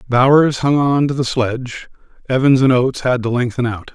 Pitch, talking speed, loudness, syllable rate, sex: 130 Hz, 200 wpm, -15 LUFS, 5.3 syllables/s, male